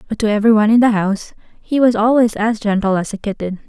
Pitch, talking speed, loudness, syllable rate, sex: 215 Hz, 245 wpm, -15 LUFS, 6.9 syllables/s, female